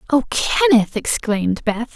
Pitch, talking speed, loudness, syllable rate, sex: 240 Hz, 125 wpm, -18 LUFS, 5.6 syllables/s, female